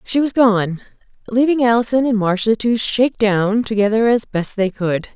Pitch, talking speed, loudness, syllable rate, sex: 220 Hz, 175 wpm, -16 LUFS, 4.9 syllables/s, female